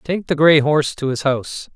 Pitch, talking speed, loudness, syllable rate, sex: 145 Hz, 240 wpm, -17 LUFS, 5.3 syllables/s, male